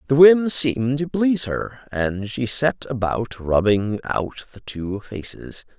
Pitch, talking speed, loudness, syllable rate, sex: 125 Hz, 155 wpm, -21 LUFS, 3.9 syllables/s, male